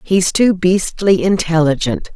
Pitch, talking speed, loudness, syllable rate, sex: 175 Hz, 110 wpm, -14 LUFS, 3.9 syllables/s, female